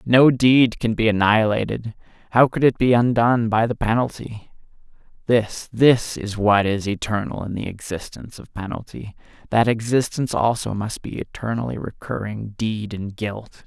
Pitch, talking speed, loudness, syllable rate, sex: 110 Hz, 150 wpm, -20 LUFS, 4.8 syllables/s, male